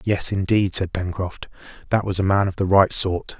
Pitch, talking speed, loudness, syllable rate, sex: 95 Hz, 210 wpm, -20 LUFS, 4.9 syllables/s, male